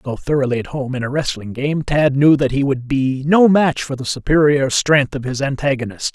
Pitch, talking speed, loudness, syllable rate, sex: 140 Hz, 225 wpm, -17 LUFS, 5.2 syllables/s, male